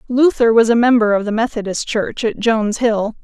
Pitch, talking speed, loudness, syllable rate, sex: 225 Hz, 205 wpm, -15 LUFS, 5.3 syllables/s, female